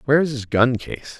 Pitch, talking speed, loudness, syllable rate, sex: 125 Hz, 200 wpm, -20 LUFS, 6.7 syllables/s, male